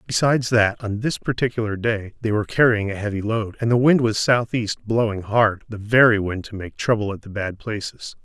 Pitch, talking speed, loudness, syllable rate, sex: 110 Hz, 205 wpm, -21 LUFS, 5.3 syllables/s, male